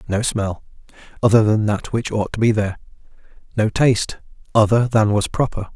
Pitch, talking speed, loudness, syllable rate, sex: 110 Hz, 145 wpm, -19 LUFS, 5.5 syllables/s, male